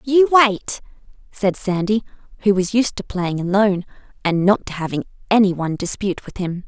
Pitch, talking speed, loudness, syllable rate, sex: 195 Hz, 170 wpm, -19 LUFS, 5.4 syllables/s, female